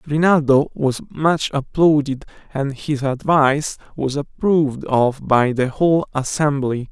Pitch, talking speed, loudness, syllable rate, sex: 145 Hz, 120 wpm, -18 LUFS, 4.2 syllables/s, male